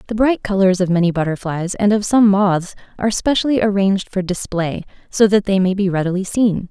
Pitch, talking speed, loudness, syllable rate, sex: 195 Hz, 195 wpm, -17 LUFS, 5.6 syllables/s, female